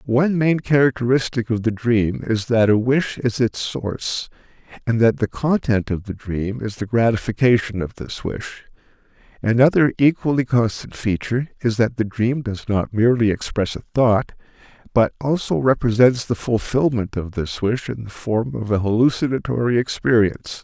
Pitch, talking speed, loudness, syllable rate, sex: 115 Hz, 160 wpm, -20 LUFS, 4.9 syllables/s, male